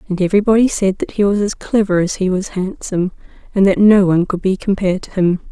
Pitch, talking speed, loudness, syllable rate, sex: 190 Hz, 230 wpm, -16 LUFS, 6.4 syllables/s, female